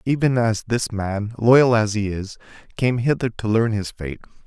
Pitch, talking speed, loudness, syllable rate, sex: 115 Hz, 190 wpm, -20 LUFS, 4.5 syllables/s, male